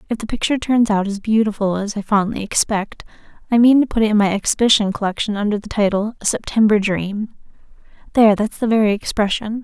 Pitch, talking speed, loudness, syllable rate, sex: 210 Hz, 195 wpm, -17 LUFS, 6.2 syllables/s, female